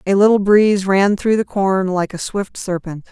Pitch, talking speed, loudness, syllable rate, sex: 195 Hz, 210 wpm, -16 LUFS, 4.7 syllables/s, female